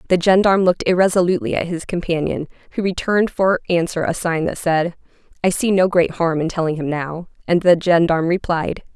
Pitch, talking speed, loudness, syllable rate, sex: 175 Hz, 190 wpm, -18 LUFS, 5.9 syllables/s, female